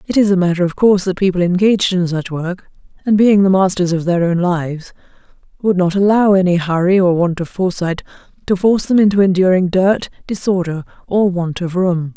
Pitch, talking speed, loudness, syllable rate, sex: 185 Hz, 195 wpm, -15 LUFS, 5.7 syllables/s, female